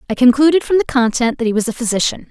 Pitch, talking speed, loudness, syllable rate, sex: 255 Hz, 260 wpm, -15 LUFS, 7.1 syllables/s, female